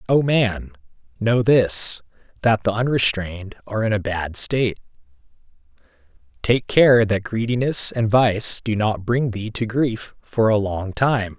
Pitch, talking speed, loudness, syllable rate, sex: 110 Hz, 150 wpm, -19 LUFS, 4.1 syllables/s, male